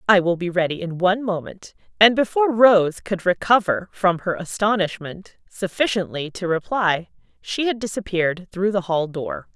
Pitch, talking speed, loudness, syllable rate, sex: 190 Hz, 155 wpm, -21 LUFS, 4.9 syllables/s, female